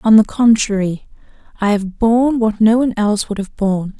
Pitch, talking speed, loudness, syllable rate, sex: 215 Hz, 195 wpm, -15 LUFS, 5.7 syllables/s, female